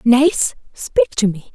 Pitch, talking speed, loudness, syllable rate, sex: 220 Hz, 155 wpm, -17 LUFS, 3.1 syllables/s, female